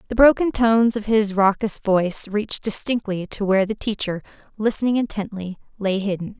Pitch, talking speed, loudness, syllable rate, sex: 210 Hz, 160 wpm, -21 LUFS, 5.5 syllables/s, female